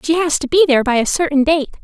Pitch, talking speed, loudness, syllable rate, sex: 295 Hz, 295 wpm, -15 LUFS, 7.0 syllables/s, female